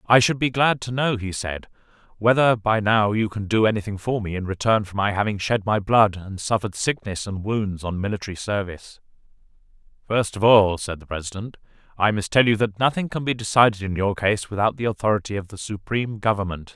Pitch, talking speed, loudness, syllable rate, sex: 105 Hz, 210 wpm, -22 LUFS, 5.7 syllables/s, male